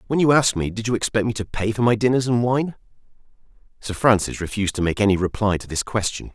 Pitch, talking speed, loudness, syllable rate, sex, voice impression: 110 Hz, 235 wpm, -21 LUFS, 6.6 syllables/s, male, masculine, very adult-like, slightly middle-aged, thick, tensed, powerful, bright, slightly hard, slightly muffled, very fluent, very cool, intellectual, refreshing, very sincere, calm, mature, friendly, very reassuring, slightly unique, wild, sweet, slightly lively, very kind